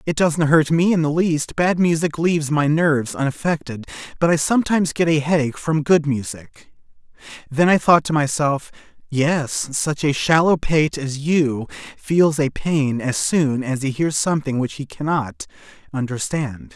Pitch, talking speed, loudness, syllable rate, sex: 150 Hz, 170 wpm, -19 LUFS, 4.6 syllables/s, male